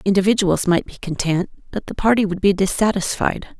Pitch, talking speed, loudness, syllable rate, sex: 190 Hz, 165 wpm, -19 LUFS, 5.4 syllables/s, female